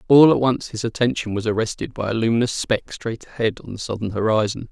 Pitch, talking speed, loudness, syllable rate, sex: 115 Hz, 215 wpm, -21 LUFS, 6.1 syllables/s, male